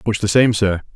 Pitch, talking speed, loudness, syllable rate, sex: 105 Hz, 255 wpm, -16 LUFS, 5.5 syllables/s, male